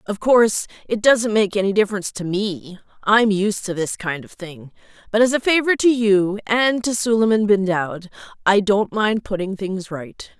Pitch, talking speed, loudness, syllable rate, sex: 205 Hz, 180 wpm, -19 LUFS, 4.7 syllables/s, female